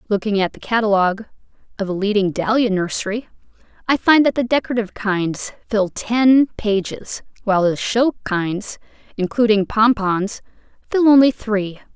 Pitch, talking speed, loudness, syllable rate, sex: 215 Hz, 135 wpm, -18 LUFS, 5.0 syllables/s, female